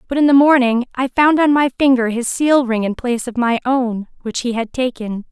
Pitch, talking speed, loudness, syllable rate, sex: 250 Hz, 235 wpm, -16 LUFS, 5.2 syllables/s, female